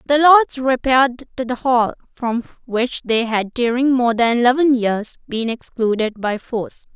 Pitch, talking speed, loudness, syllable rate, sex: 245 Hz, 165 wpm, -18 LUFS, 4.5 syllables/s, female